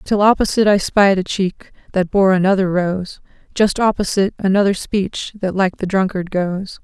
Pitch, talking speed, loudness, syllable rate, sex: 195 Hz, 165 wpm, -17 LUFS, 4.9 syllables/s, female